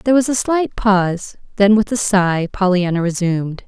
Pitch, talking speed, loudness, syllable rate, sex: 200 Hz, 180 wpm, -16 LUFS, 5.0 syllables/s, female